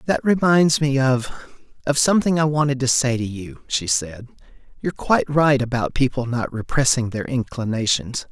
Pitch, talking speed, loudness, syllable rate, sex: 130 Hz, 160 wpm, -20 LUFS, 5.0 syllables/s, male